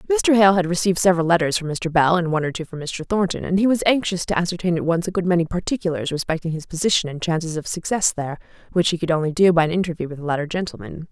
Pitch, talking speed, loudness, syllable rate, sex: 170 Hz, 260 wpm, -20 LUFS, 7.2 syllables/s, female